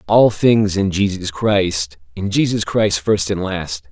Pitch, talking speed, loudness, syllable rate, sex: 95 Hz, 155 wpm, -17 LUFS, 3.7 syllables/s, male